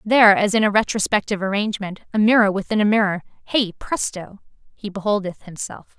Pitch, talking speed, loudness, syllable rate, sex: 205 Hz, 160 wpm, -19 LUFS, 6.0 syllables/s, female